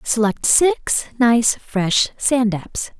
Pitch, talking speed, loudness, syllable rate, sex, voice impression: 225 Hz, 120 wpm, -17 LUFS, 2.8 syllables/s, female, very feminine, young, very thin, tensed, slightly powerful, very bright, soft, muffled, fluent, slightly raspy, very cute, intellectual, very refreshing, sincere, slightly calm, very friendly, very reassuring, very unique, elegant, slightly wild, very sweet, very lively, kind, slightly sharp, slightly modest